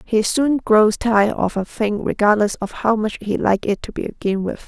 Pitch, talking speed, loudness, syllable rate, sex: 215 Hz, 220 wpm, -19 LUFS, 4.9 syllables/s, female